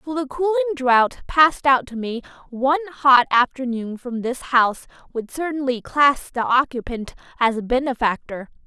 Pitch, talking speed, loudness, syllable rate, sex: 260 Hz, 150 wpm, -20 LUFS, 4.7 syllables/s, female